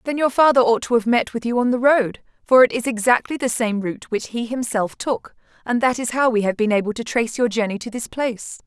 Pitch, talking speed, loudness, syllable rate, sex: 235 Hz, 265 wpm, -20 LUFS, 5.9 syllables/s, female